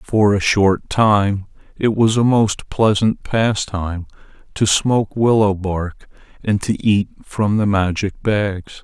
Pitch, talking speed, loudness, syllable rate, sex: 105 Hz, 145 wpm, -17 LUFS, 3.6 syllables/s, male